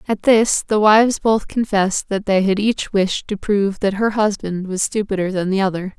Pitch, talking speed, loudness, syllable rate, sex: 200 Hz, 210 wpm, -18 LUFS, 5.0 syllables/s, female